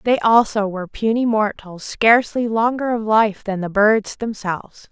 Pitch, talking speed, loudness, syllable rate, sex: 215 Hz, 160 wpm, -18 LUFS, 4.6 syllables/s, female